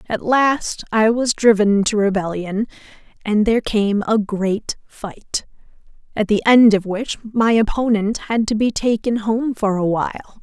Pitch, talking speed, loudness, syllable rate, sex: 215 Hz, 155 wpm, -18 LUFS, 4.3 syllables/s, female